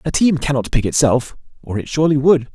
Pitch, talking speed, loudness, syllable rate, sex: 140 Hz, 215 wpm, -17 LUFS, 6.1 syllables/s, male